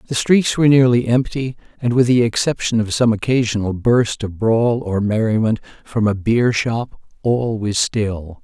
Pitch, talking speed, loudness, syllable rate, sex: 115 Hz, 170 wpm, -17 LUFS, 4.5 syllables/s, male